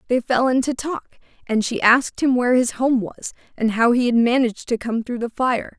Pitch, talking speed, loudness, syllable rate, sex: 245 Hz, 230 wpm, -20 LUFS, 5.5 syllables/s, female